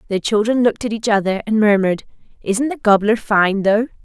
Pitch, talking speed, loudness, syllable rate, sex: 215 Hz, 195 wpm, -17 LUFS, 5.8 syllables/s, female